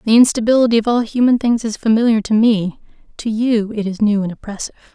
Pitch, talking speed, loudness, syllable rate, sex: 220 Hz, 205 wpm, -16 LUFS, 6.3 syllables/s, female